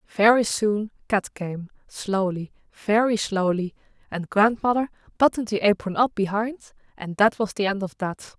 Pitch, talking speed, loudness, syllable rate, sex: 205 Hz, 135 wpm, -23 LUFS, 4.8 syllables/s, female